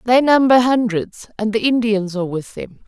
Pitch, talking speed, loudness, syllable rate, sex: 225 Hz, 190 wpm, -17 LUFS, 5.0 syllables/s, female